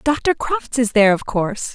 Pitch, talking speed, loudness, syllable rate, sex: 245 Hz, 205 wpm, -18 LUFS, 4.9 syllables/s, female